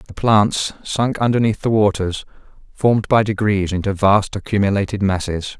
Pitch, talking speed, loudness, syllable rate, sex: 100 Hz, 140 wpm, -18 LUFS, 5.0 syllables/s, male